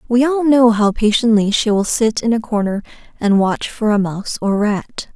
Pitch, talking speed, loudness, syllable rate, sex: 220 Hz, 210 wpm, -16 LUFS, 4.8 syllables/s, female